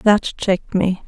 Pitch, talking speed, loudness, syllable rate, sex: 195 Hz, 165 wpm, -19 LUFS, 4.0 syllables/s, female